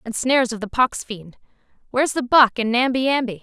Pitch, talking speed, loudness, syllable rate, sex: 245 Hz, 195 wpm, -19 LUFS, 5.8 syllables/s, female